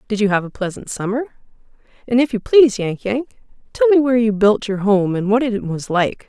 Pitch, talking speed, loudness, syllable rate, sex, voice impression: 215 Hz, 230 wpm, -17 LUFS, 5.5 syllables/s, female, feminine, slightly gender-neutral, young, slightly adult-like, thin, tensed, slightly weak, bright, hard, clear, fluent, cute, intellectual, slightly refreshing, slightly sincere, calm, slightly friendly, slightly elegant, slightly sweet, kind, slightly modest